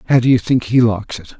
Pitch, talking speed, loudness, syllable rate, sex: 115 Hz, 300 wpm, -15 LUFS, 6.8 syllables/s, male